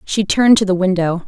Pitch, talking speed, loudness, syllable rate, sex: 190 Hz, 235 wpm, -14 LUFS, 6.0 syllables/s, female